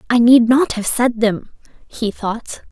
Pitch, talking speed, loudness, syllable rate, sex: 235 Hz, 175 wpm, -15 LUFS, 3.8 syllables/s, female